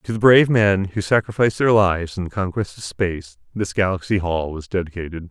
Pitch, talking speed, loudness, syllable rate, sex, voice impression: 95 Hz, 205 wpm, -19 LUFS, 5.9 syllables/s, male, masculine, adult-like, thick, tensed, slightly powerful, clear, intellectual, calm, friendly, wild, lively, kind, slightly modest